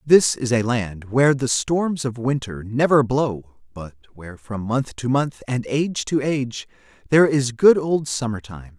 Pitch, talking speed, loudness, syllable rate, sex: 125 Hz, 185 wpm, -20 LUFS, 4.4 syllables/s, male